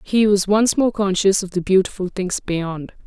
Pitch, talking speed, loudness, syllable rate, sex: 195 Hz, 195 wpm, -19 LUFS, 4.7 syllables/s, female